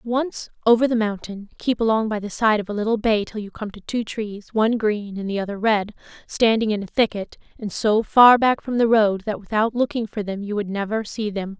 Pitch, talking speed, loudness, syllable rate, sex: 215 Hz, 240 wpm, -21 LUFS, 5.4 syllables/s, female